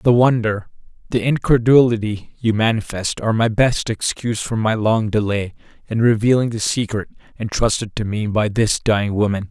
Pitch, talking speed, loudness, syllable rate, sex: 110 Hz, 160 wpm, -18 LUFS, 5.2 syllables/s, male